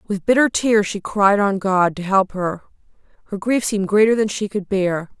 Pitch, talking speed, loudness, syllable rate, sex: 200 Hz, 210 wpm, -18 LUFS, 4.9 syllables/s, female